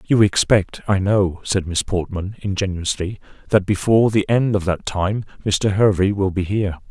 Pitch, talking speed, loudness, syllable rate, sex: 100 Hz, 175 wpm, -19 LUFS, 4.8 syllables/s, male